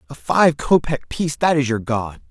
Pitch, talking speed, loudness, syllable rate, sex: 135 Hz, 180 wpm, -19 LUFS, 4.9 syllables/s, male